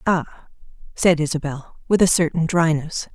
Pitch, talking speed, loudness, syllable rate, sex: 165 Hz, 135 wpm, -20 LUFS, 4.6 syllables/s, female